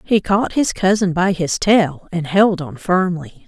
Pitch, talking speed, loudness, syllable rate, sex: 185 Hz, 190 wpm, -17 LUFS, 3.9 syllables/s, female